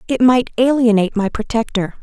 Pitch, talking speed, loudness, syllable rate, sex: 230 Hz, 150 wpm, -16 LUFS, 6.2 syllables/s, female